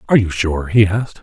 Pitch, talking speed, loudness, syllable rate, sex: 95 Hz, 245 wpm, -16 LUFS, 6.7 syllables/s, male